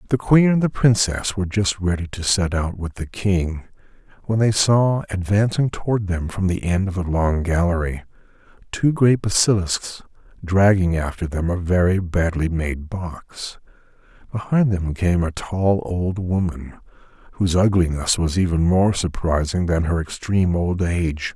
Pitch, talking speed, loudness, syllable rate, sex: 90 Hz, 155 wpm, -20 LUFS, 4.5 syllables/s, male